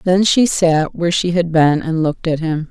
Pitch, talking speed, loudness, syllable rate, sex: 170 Hz, 245 wpm, -15 LUFS, 5.0 syllables/s, female